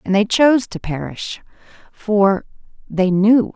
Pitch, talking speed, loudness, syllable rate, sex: 210 Hz, 135 wpm, -17 LUFS, 4.0 syllables/s, female